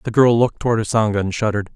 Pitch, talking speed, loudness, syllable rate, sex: 110 Hz, 240 wpm, -18 LUFS, 8.0 syllables/s, male